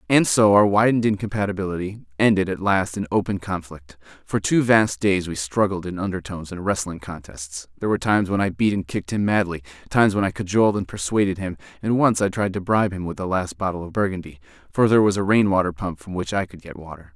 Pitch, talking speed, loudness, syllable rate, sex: 95 Hz, 225 wpm, -21 LUFS, 6.3 syllables/s, male